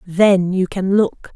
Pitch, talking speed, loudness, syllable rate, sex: 190 Hz, 180 wpm, -16 LUFS, 3.3 syllables/s, female